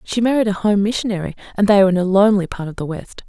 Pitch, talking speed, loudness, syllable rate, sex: 200 Hz, 275 wpm, -17 LUFS, 7.4 syllables/s, female